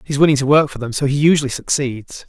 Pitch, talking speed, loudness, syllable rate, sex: 140 Hz, 290 wpm, -16 LUFS, 6.9 syllables/s, male